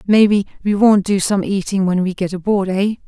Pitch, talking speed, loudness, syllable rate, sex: 195 Hz, 215 wpm, -16 LUFS, 5.3 syllables/s, female